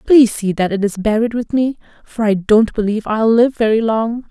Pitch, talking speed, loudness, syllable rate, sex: 220 Hz, 225 wpm, -15 LUFS, 5.3 syllables/s, female